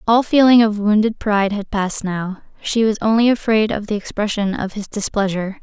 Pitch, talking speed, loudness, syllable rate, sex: 210 Hz, 190 wpm, -17 LUFS, 5.5 syllables/s, female